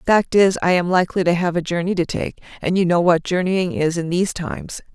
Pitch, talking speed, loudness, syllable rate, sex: 175 Hz, 245 wpm, -19 LUFS, 6.1 syllables/s, female